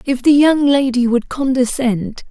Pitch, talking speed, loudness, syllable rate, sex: 255 Hz, 155 wpm, -15 LUFS, 4.2 syllables/s, female